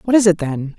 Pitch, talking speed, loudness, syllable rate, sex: 185 Hz, 305 wpm, -16 LUFS, 5.3 syllables/s, female